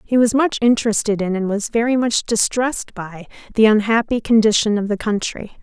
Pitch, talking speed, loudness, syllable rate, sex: 220 Hz, 180 wpm, -17 LUFS, 5.4 syllables/s, female